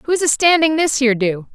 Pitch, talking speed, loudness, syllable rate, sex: 280 Hz, 195 wpm, -15 LUFS, 5.4 syllables/s, female